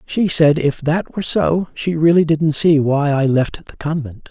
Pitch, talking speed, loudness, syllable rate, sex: 150 Hz, 210 wpm, -16 LUFS, 4.4 syllables/s, male